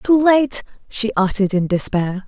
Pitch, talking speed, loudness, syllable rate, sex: 230 Hz, 160 wpm, -17 LUFS, 4.7 syllables/s, female